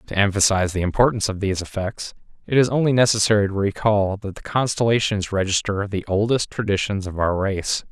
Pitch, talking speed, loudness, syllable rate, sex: 100 Hz, 175 wpm, -21 LUFS, 6.0 syllables/s, male